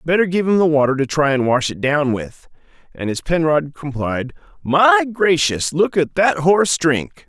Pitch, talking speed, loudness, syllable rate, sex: 155 Hz, 190 wpm, -17 LUFS, 4.6 syllables/s, male